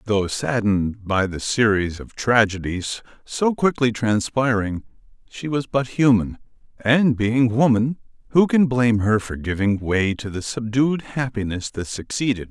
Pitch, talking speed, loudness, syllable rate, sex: 115 Hz, 145 wpm, -21 LUFS, 4.3 syllables/s, male